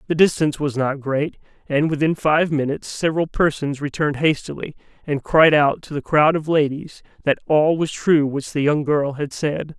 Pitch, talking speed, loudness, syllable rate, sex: 150 Hz, 190 wpm, -19 LUFS, 5.1 syllables/s, male